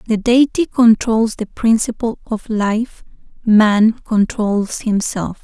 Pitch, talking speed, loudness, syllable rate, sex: 220 Hz, 110 wpm, -16 LUFS, 3.4 syllables/s, female